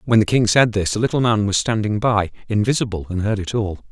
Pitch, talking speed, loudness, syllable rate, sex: 105 Hz, 245 wpm, -19 LUFS, 5.9 syllables/s, male